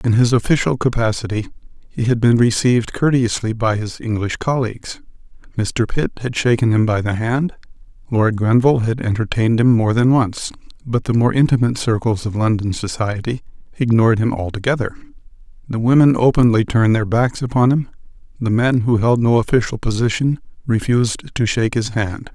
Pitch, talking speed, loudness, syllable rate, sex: 115 Hz, 160 wpm, -17 LUFS, 5.5 syllables/s, male